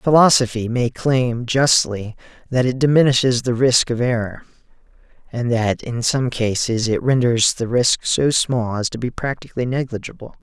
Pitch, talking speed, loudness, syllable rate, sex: 120 Hz, 155 wpm, -18 LUFS, 4.8 syllables/s, male